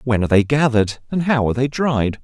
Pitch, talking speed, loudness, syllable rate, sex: 125 Hz, 240 wpm, -18 LUFS, 6.4 syllables/s, male